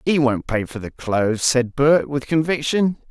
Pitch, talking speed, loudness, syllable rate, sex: 135 Hz, 195 wpm, -20 LUFS, 4.6 syllables/s, male